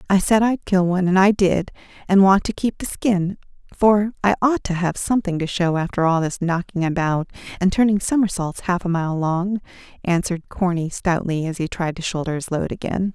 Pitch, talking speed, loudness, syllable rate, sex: 185 Hz, 205 wpm, -20 LUFS, 5.3 syllables/s, female